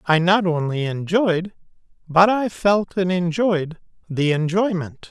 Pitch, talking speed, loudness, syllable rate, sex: 180 Hz, 130 wpm, -20 LUFS, 3.8 syllables/s, male